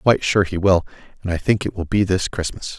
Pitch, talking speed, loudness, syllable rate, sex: 95 Hz, 280 wpm, -20 LUFS, 6.9 syllables/s, male